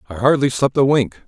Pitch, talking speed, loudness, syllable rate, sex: 130 Hz, 235 wpm, -17 LUFS, 5.7 syllables/s, male